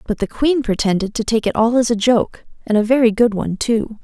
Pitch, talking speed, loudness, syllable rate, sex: 225 Hz, 255 wpm, -17 LUFS, 5.7 syllables/s, female